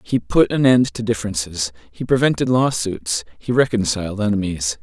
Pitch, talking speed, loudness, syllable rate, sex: 105 Hz, 150 wpm, -19 LUFS, 5.2 syllables/s, male